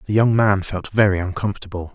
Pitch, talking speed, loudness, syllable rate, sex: 100 Hz, 185 wpm, -19 LUFS, 6.2 syllables/s, male